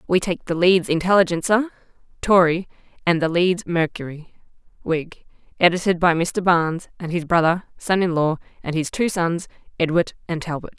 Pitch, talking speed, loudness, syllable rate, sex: 175 Hz, 155 wpm, -20 LUFS, 5.1 syllables/s, female